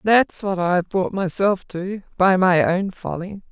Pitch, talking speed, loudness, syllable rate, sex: 190 Hz, 170 wpm, -20 LUFS, 4.1 syllables/s, female